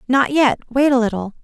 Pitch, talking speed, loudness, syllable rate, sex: 250 Hz, 210 wpm, -17 LUFS, 5.5 syllables/s, female